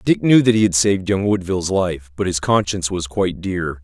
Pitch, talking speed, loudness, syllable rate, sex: 95 Hz, 235 wpm, -18 LUFS, 5.8 syllables/s, male